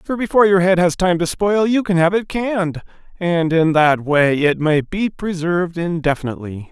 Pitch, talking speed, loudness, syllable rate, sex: 175 Hz, 195 wpm, -17 LUFS, 5.1 syllables/s, male